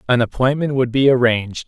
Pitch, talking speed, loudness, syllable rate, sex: 125 Hz, 180 wpm, -17 LUFS, 6.0 syllables/s, male